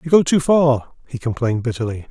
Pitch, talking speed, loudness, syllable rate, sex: 135 Hz, 200 wpm, -18 LUFS, 5.9 syllables/s, male